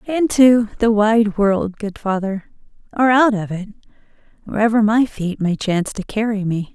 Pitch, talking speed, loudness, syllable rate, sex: 210 Hz, 170 wpm, -17 LUFS, 4.7 syllables/s, female